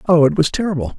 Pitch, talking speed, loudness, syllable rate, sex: 160 Hz, 245 wpm, -16 LUFS, 6.9 syllables/s, male